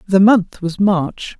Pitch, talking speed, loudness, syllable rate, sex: 190 Hz, 170 wpm, -15 LUFS, 3.2 syllables/s, female